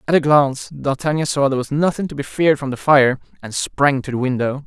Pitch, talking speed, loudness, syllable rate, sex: 140 Hz, 245 wpm, -18 LUFS, 6.1 syllables/s, male